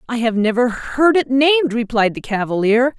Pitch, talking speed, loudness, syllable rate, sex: 245 Hz, 180 wpm, -16 LUFS, 5.0 syllables/s, female